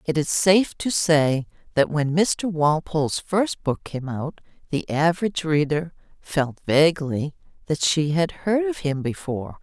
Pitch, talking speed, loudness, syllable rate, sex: 160 Hz, 155 wpm, -22 LUFS, 4.3 syllables/s, female